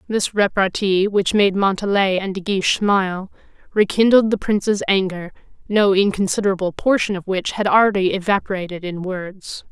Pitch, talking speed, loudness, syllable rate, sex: 195 Hz, 140 wpm, -18 LUFS, 5.2 syllables/s, female